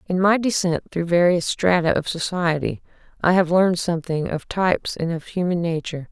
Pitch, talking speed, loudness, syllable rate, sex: 175 Hz, 175 wpm, -21 LUFS, 5.4 syllables/s, female